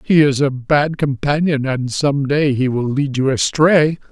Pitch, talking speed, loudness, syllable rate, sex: 140 Hz, 190 wpm, -16 LUFS, 4.1 syllables/s, male